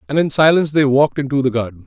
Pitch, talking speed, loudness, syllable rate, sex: 140 Hz, 260 wpm, -15 LUFS, 7.7 syllables/s, male